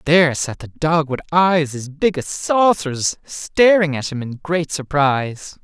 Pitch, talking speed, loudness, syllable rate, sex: 155 Hz, 170 wpm, -18 LUFS, 3.9 syllables/s, male